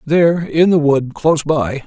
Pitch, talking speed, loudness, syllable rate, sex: 150 Hz, 195 wpm, -15 LUFS, 4.5 syllables/s, male